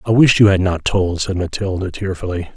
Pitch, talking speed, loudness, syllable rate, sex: 95 Hz, 210 wpm, -17 LUFS, 5.4 syllables/s, male